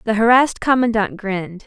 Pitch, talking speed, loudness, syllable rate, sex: 220 Hz, 145 wpm, -17 LUFS, 5.8 syllables/s, female